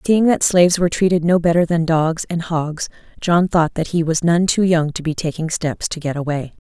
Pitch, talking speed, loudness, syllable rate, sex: 165 Hz, 235 wpm, -18 LUFS, 5.3 syllables/s, female